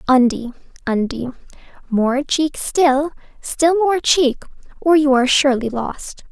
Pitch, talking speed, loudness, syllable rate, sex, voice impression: 275 Hz, 125 wpm, -17 LUFS, 4.0 syllables/s, female, feminine, very young, tensed, powerful, bright, soft, clear, cute, slightly refreshing, calm, friendly, sweet, lively